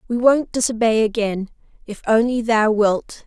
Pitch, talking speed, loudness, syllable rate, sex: 225 Hz, 145 wpm, -18 LUFS, 4.5 syllables/s, female